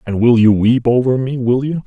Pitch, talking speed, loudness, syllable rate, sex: 120 Hz, 260 wpm, -14 LUFS, 5.2 syllables/s, male